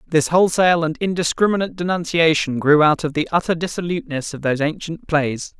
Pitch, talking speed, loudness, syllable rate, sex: 160 Hz, 160 wpm, -19 LUFS, 6.1 syllables/s, male